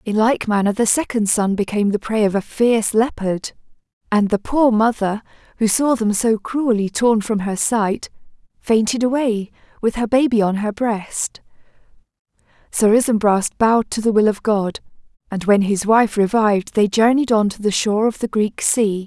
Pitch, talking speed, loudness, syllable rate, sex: 215 Hz, 180 wpm, -18 LUFS, 4.9 syllables/s, female